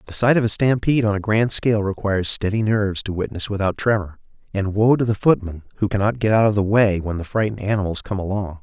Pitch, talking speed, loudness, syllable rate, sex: 105 Hz, 235 wpm, -20 LUFS, 6.4 syllables/s, male